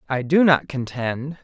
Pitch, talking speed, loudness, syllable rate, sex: 140 Hz, 165 wpm, -20 LUFS, 4.2 syllables/s, male